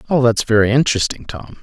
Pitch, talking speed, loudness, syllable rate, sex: 120 Hz, 185 wpm, -15 LUFS, 6.4 syllables/s, male